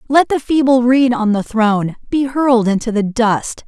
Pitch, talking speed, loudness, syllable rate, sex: 240 Hz, 195 wpm, -15 LUFS, 4.8 syllables/s, female